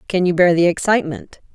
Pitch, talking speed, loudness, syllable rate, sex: 180 Hz, 195 wpm, -16 LUFS, 6.2 syllables/s, female